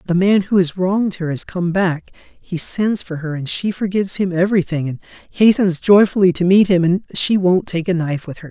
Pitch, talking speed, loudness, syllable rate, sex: 180 Hz, 225 wpm, -17 LUFS, 5.4 syllables/s, male